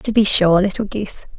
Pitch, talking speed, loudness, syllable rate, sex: 200 Hz, 215 wpm, -16 LUFS, 5.8 syllables/s, female